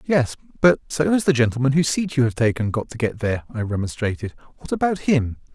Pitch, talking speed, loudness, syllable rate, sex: 125 Hz, 215 wpm, -21 LUFS, 6.2 syllables/s, male